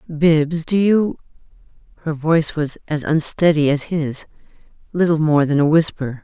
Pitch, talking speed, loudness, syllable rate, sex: 155 Hz, 135 wpm, -18 LUFS, 4.4 syllables/s, female